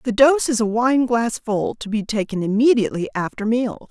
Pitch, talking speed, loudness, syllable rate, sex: 230 Hz, 185 wpm, -19 LUFS, 5.1 syllables/s, female